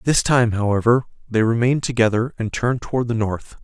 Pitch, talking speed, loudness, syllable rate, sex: 115 Hz, 180 wpm, -19 LUFS, 5.9 syllables/s, male